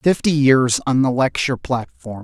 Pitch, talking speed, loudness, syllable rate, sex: 130 Hz, 160 wpm, -17 LUFS, 4.7 syllables/s, male